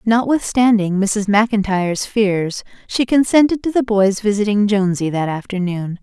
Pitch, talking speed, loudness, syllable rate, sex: 210 Hz, 130 wpm, -17 LUFS, 4.6 syllables/s, female